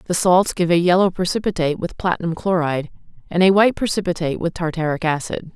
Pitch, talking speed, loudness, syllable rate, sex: 175 Hz, 175 wpm, -19 LUFS, 6.6 syllables/s, female